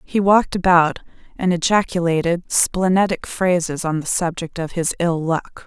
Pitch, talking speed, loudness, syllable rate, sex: 175 Hz, 150 wpm, -19 LUFS, 4.6 syllables/s, female